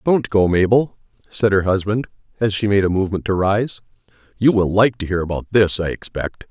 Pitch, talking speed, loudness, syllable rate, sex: 105 Hz, 205 wpm, -18 LUFS, 5.4 syllables/s, male